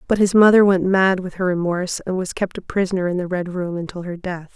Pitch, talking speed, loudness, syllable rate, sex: 185 Hz, 265 wpm, -19 LUFS, 5.9 syllables/s, female